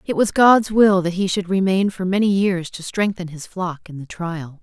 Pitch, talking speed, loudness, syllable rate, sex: 185 Hz, 235 wpm, -19 LUFS, 4.6 syllables/s, female